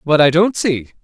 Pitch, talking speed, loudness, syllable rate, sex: 160 Hz, 235 wpm, -15 LUFS, 5.1 syllables/s, male